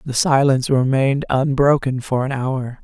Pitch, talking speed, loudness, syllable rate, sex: 135 Hz, 150 wpm, -18 LUFS, 4.9 syllables/s, female